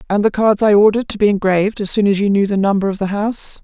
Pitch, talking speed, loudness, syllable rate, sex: 205 Hz, 295 wpm, -15 LUFS, 7.0 syllables/s, female